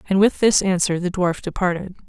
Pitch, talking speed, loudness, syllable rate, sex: 185 Hz, 200 wpm, -20 LUFS, 5.5 syllables/s, female